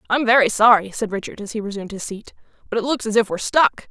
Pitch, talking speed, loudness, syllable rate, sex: 220 Hz, 275 wpm, -19 LUFS, 7.1 syllables/s, female